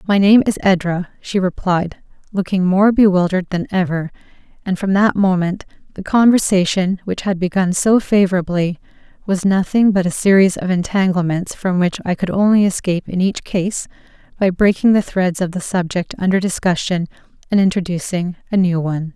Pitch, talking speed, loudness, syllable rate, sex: 185 Hz, 165 wpm, -16 LUFS, 5.3 syllables/s, female